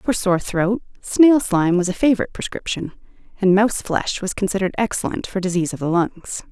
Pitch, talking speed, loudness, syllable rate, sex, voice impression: 195 Hz, 185 wpm, -19 LUFS, 6.0 syllables/s, female, feminine, adult-like, slightly soft, sincere, slightly calm, slightly friendly